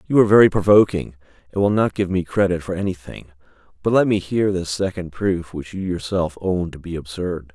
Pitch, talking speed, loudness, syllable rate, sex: 90 Hz, 205 wpm, -20 LUFS, 5.6 syllables/s, male